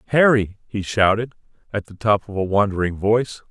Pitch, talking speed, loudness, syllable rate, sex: 105 Hz, 170 wpm, -20 LUFS, 5.5 syllables/s, male